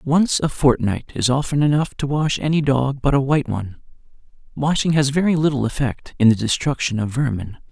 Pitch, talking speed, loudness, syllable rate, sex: 135 Hz, 185 wpm, -19 LUFS, 5.5 syllables/s, male